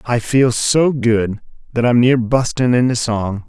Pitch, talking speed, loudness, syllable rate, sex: 120 Hz, 170 wpm, -16 LUFS, 3.9 syllables/s, male